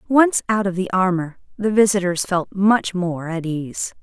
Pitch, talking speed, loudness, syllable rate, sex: 190 Hz, 180 wpm, -19 LUFS, 4.2 syllables/s, female